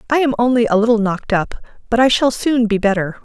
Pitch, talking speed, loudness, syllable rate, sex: 230 Hz, 240 wpm, -16 LUFS, 6.3 syllables/s, female